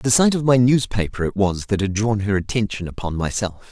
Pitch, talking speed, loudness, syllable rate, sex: 105 Hz, 225 wpm, -20 LUFS, 5.5 syllables/s, male